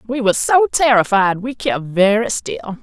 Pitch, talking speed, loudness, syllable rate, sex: 220 Hz, 170 wpm, -16 LUFS, 5.0 syllables/s, female